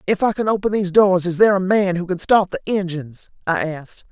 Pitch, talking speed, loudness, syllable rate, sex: 185 Hz, 250 wpm, -18 LUFS, 6.2 syllables/s, female